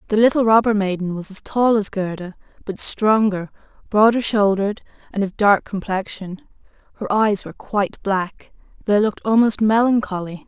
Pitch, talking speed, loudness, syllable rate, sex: 205 Hz, 150 wpm, -19 LUFS, 5.1 syllables/s, female